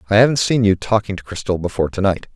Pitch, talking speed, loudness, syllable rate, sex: 105 Hz, 255 wpm, -18 LUFS, 7.1 syllables/s, male